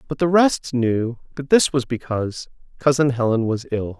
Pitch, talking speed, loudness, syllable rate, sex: 130 Hz, 180 wpm, -20 LUFS, 4.9 syllables/s, male